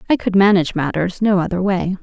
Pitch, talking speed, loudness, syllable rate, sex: 190 Hz, 205 wpm, -17 LUFS, 6.1 syllables/s, female